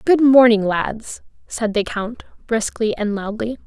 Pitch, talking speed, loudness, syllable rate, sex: 225 Hz, 145 wpm, -18 LUFS, 3.9 syllables/s, female